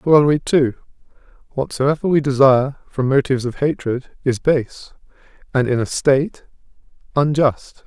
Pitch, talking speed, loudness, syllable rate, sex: 135 Hz, 115 wpm, -18 LUFS, 5.0 syllables/s, male